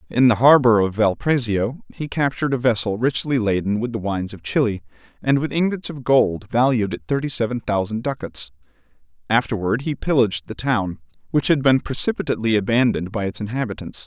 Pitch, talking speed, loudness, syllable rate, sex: 115 Hz, 170 wpm, -20 LUFS, 5.9 syllables/s, male